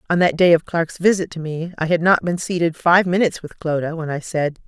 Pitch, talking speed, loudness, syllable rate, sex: 170 Hz, 255 wpm, -19 LUFS, 5.8 syllables/s, female